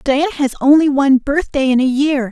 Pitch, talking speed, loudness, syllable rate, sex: 275 Hz, 210 wpm, -14 LUFS, 5.6 syllables/s, female